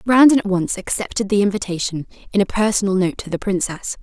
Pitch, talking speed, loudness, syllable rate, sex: 200 Hz, 195 wpm, -19 LUFS, 6.0 syllables/s, female